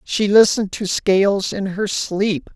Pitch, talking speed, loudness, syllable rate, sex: 200 Hz, 165 wpm, -18 LUFS, 4.1 syllables/s, female